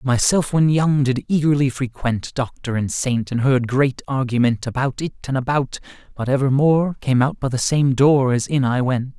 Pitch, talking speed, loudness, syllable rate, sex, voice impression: 135 Hz, 190 wpm, -19 LUFS, 4.9 syllables/s, male, masculine, slightly young, slightly adult-like, slightly relaxed, slightly weak, slightly bright, slightly soft, clear, fluent, cool, intellectual, slightly refreshing, sincere, calm, friendly, reassuring, slightly unique, slightly wild, slightly sweet, very lively, kind, slightly intense